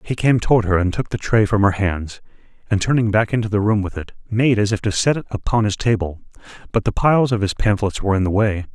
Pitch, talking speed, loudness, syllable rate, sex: 105 Hz, 260 wpm, -19 LUFS, 6.3 syllables/s, male